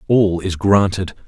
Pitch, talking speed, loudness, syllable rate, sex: 95 Hz, 140 wpm, -17 LUFS, 4.0 syllables/s, male